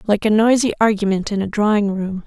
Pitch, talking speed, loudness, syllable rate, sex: 210 Hz, 210 wpm, -17 LUFS, 5.8 syllables/s, female